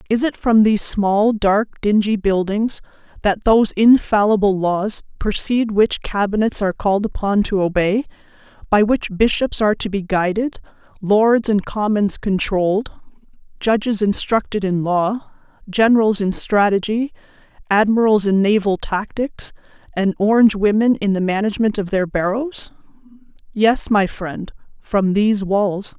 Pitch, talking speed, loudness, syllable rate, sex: 205 Hz, 130 wpm, -17 LUFS, 4.6 syllables/s, female